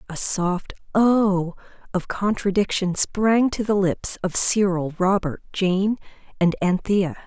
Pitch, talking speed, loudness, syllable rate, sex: 190 Hz, 125 wpm, -21 LUFS, 3.6 syllables/s, female